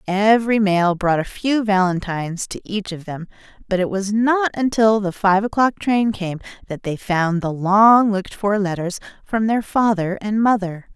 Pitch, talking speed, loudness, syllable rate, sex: 200 Hz, 180 wpm, -19 LUFS, 4.5 syllables/s, female